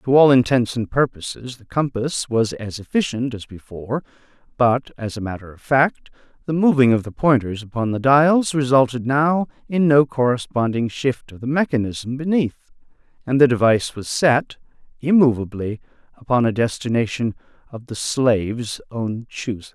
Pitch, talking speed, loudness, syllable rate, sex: 125 Hz, 150 wpm, -20 LUFS, 4.9 syllables/s, male